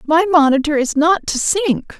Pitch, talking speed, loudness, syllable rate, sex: 305 Hz, 180 wpm, -15 LUFS, 4.4 syllables/s, female